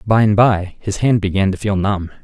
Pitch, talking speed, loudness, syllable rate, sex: 100 Hz, 240 wpm, -16 LUFS, 5.1 syllables/s, male